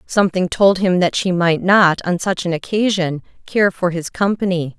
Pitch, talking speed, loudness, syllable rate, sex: 180 Hz, 190 wpm, -17 LUFS, 4.7 syllables/s, female